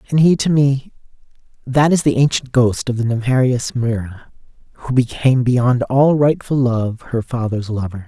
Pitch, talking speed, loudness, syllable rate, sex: 125 Hz, 165 wpm, -17 LUFS, 4.7 syllables/s, male